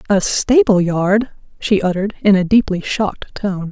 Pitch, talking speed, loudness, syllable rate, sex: 200 Hz, 160 wpm, -16 LUFS, 4.8 syllables/s, female